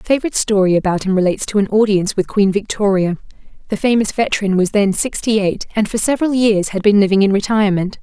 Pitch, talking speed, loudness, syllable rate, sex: 205 Hz, 210 wpm, -16 LUFS, 6.7 syllables/s, female